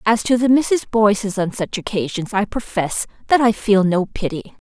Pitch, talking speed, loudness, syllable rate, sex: 210 Hz, 195 wpm, -18 LUFS, 4.8 syllables/s, female